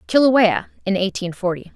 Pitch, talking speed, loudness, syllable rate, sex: 205 Hz, 135 wpm, -19 LUFS, 4.8 syllables/s, female